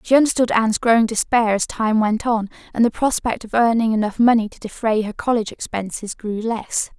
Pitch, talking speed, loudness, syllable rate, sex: 225 Hz, 200 wpm, -19 LUFS, 5.6 syllables/s, female